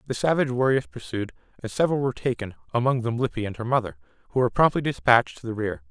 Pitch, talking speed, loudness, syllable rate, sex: 120 Hz, 215 wpm, -24 LUFS, 7.5 syllables/s, male